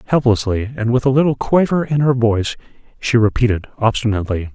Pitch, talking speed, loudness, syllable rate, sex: 120 Hz, 160 wpm, -17 LUFS, 6.1 syllables/s, male